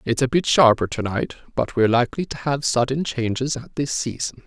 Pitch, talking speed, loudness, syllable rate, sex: 130 Hz, 215 wpm, -21 LUFS, 5.5 syllables/s, male